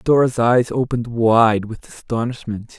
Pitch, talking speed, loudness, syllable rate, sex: 115 Hz, 130 wpm, -18 LUFS, 4.5 syllables/s, male